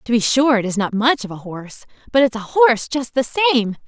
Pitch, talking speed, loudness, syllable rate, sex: 240 Hz, 265 wpm, -17 LUFS, 5.7 syllables/s, female